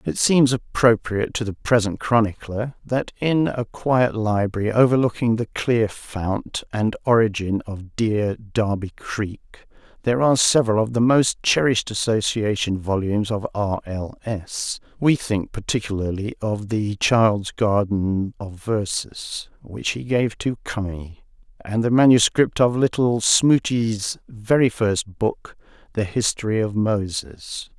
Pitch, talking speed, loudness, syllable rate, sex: 110 Hz, 130 wpm, -21 LUFS, 4.0 syllables/s, male